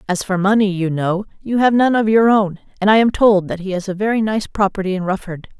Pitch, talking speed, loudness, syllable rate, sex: 200 Hz, 255 wpm, -17 LUFS, 5.8 syllables/s, female